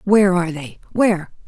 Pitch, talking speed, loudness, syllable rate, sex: 180 Hz, 165 wpm, -18 LUFS, 6.3 syllables/s, female